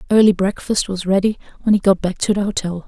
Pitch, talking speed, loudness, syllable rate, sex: 195 Hz, 230 wpm, -18 LUFS, 6.3 syllables/s, female